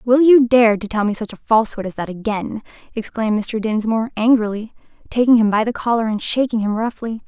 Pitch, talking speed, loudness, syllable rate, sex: 225 Hz, 205 wpm, -18 LUFS, 5.9 syllables/s, female